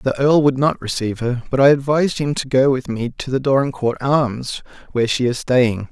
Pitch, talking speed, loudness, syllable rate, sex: 130 Hz, 225 wpm, -18 LUFS, 5.4 syllables/s, male